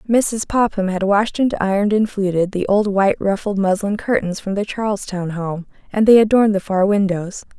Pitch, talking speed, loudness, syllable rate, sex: 200 Hz, 190 wpm, -18 LUFS, 5.4 syllables/s, female